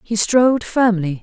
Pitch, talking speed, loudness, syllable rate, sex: 220 Hz, 145 wpm, -16 LUFS, 4.4 syllables/s, female